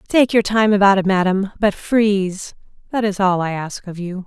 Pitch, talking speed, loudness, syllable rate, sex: 195 Hz, 210 wpm, -17 LUFS, 4.9 syllables/s, female